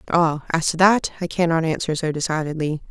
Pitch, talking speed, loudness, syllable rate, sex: 165 Hz, 185 wpm, -21 LUFS, 5.7 syllables/s, female